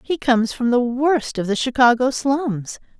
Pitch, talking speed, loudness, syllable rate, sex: 250 Hz, 180 wpm, -19 LUFS, 4.4 syllables/s, female